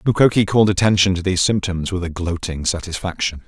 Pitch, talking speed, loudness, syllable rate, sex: 95 Hz, 175 wpm, -18 LUFS, 6.3 syllables/s, male